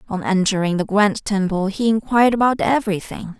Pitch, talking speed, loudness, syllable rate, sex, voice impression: 205 Hz, 160 wpm, -18 LUFS, 5.6 syllables/s, female, feminine, adult-like, slightly calm, slightly unique